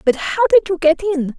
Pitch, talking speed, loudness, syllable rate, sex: 350 Hz, 260 wpm, -16 LUFS, 5.7 syllables/s, female